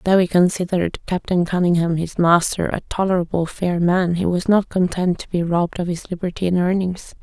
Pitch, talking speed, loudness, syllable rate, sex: 175 Hz, 190 wpm, -19 LUFS, 5.4 syllables/s, female